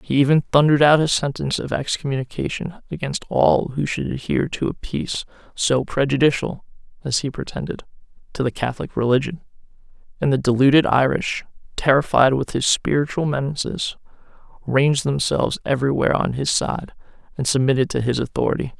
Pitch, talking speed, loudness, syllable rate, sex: 135 Hz, 145 wpm, -20 LUFS, 5.9 syllables/s, male